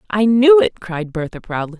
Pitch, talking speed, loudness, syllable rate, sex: 200 Hz, 200 wpm, -16 LUFS, 5.0 syllables/s, female